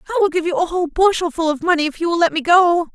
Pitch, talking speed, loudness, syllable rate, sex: 340 Hz, 305 wpm, -17 LUFS, 7.1 syllables/s, female